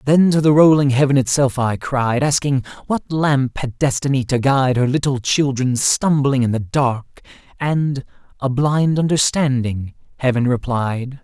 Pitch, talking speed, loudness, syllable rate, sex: 135 Hz, 145 wpm, -17 LUFS, 4.2 syllables/s, male